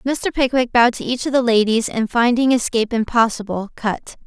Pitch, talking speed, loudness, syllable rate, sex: 240 Hz, 185 wpm, -18 LUFS, 5.4 syllables/s, female